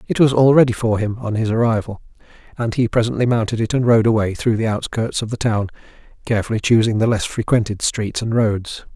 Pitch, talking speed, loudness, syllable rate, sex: 115 Hz, 210 wpm, -18 LUFS, 5.9 syllables/s, male